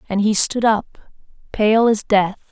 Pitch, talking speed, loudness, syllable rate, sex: 210 Hz, 165 wpm, -17 LUFS, 3.9 syllables/s, female